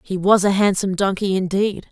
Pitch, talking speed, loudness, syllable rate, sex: 195 Hz, 190 wpm, -18 LUFS, 5.5 syllables/s, female